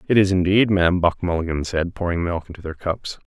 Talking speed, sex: 215 wpm, male